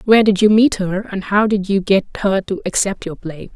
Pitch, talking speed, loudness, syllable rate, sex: 200 Hz, 255 wpm, -16 LUFS, 5.3 syllables/s, female